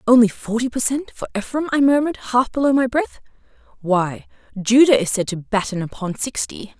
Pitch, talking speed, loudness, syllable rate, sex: 235 Hz, 175 wpm, -19 LUFS, 5.5 syllables/s, female